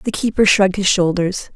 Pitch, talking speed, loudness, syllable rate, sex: 195 Hz, 195 wpm, -16 LUFS, 5.3 syllables/s, female